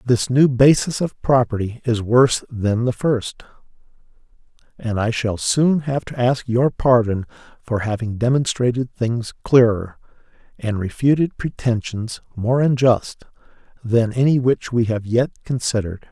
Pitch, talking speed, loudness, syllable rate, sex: 120 Hz, 135 wpm, -19 LUFS, 4.4 syllables/s, male